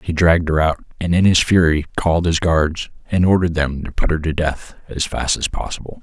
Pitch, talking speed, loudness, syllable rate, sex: 80 Hz, 230 wpm, -18 LUFS, 5.5 syllables/s, male